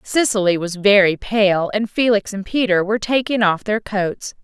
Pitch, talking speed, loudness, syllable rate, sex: 205 Hz, 175 wpm, -17 LUFS, 4.7 syllables/s, female